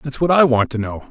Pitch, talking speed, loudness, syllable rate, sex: 130 Hz, 325 wpm, -16 LUFS, 6.1 syllables/s, male